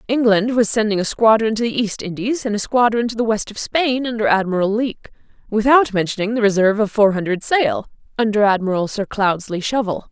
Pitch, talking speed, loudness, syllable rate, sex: 215 Hz, 195 wpm, -18 LUFS, 5.8 syllables/s, female